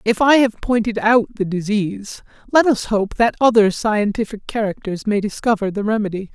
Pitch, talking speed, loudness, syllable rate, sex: 215 Hz, 170 wpm, -18 LUFS, 5.1 syllables/s, male